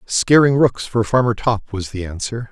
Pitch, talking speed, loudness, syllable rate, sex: 115 Hz, 190 wpm, -17 LUFS, 4.6 syllables/s, male